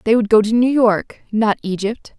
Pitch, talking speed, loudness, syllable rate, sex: 220 Hz, 220 wpm, -17 LUFS, 4.6 syllables/s, female